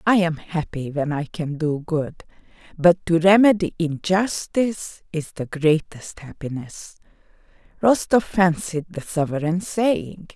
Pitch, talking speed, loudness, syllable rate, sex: 170 Hz, 120 wpm, -21 LUFS, 4.0 syllables/s, female